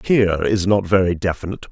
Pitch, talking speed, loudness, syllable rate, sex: 95 Hz, 175 wpm, -18 LUFS, 6.3 syllables/s, male